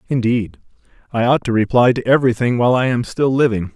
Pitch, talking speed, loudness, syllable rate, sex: 120 Hz, 190 wpm, -16 LUFS, 6.3 syllables/s, male